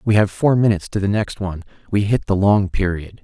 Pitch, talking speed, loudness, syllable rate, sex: 100 Hz, 225 wpm, -19 LUFS, 6.0 syllables/s, male